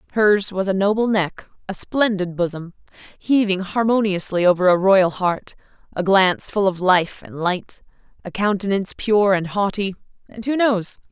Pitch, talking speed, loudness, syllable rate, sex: 195 Hz, 155 wpm, -19 LUFS, 4.7 syllables/s, female